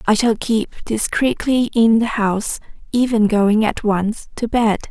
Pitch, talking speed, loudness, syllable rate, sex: 220 Hz, 160 wpm, -18 LUFS, 4.2 syllables/s, female